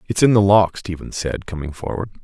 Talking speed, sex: 215 wpm, male